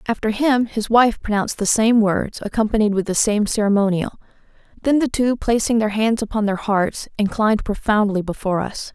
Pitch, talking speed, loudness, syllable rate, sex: 215 Hz, 175 wpm, -19 LUFS, 5.4 syllables/s, female